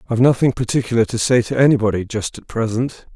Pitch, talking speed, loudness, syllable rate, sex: 115 Hz, 190 wpm, -18 LUFS, 6.6 syllables/s, male